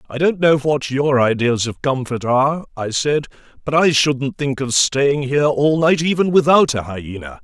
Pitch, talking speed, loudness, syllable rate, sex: 140 Hz, 195 wpm, -17 LUFS, 4.6 syllables/s, male